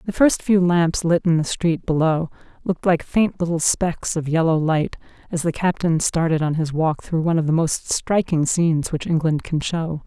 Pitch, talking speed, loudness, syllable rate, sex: 165 Hz, 210 wpm, -20 LUFS, 4.9 syllables/s, female